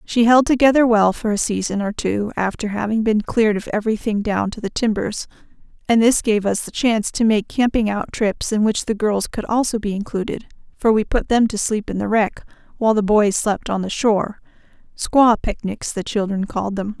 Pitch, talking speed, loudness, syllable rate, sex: 215 Hz, 210 wpm, -19 LUFS, 5.3 syllables/s, female